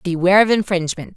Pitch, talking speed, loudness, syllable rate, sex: 185 Hz, 155 wpm, -16 LUFS, 7.6 syllables/s, female